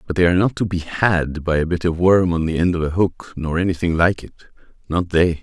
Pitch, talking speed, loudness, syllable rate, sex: 85 Hz, 255 wpm, -19 LUFS, 5.7 syllables/s, male